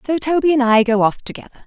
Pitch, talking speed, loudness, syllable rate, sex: 260 Hz, 255 wpm, -15 LUFS, 7.2 syllables/s, female